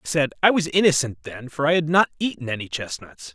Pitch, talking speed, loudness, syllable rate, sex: 150 Hz, 235 wpm, -21 LUFS, 6.1 syllables/s, male